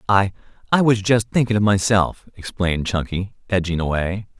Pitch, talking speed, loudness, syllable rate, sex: 100 Hz, 135 wpm, -20 LUFS, 5.2 syllables/s, male